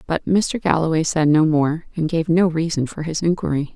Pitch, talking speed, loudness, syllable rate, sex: 160 Hz, 210 wpm, -19 LUFS, 5.2 syllables/s, female